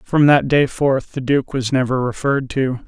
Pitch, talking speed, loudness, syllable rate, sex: 135 Hz, 210 wpm, -17 LUFS, 4.6 syllables/s, male